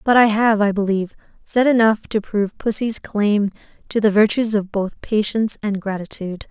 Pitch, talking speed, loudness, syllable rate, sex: 210 Hz, 175 wpm, -19 LUFS, 5.3 syllables/s, female